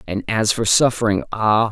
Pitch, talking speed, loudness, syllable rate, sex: 110 Hz, 140 wpm, -18 LUFS, 4.8 syllables/s, male